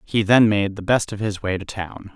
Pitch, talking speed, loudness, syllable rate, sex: 100 Hz, 280 wpm, -20 LUFS, 5.0 syllables/s, male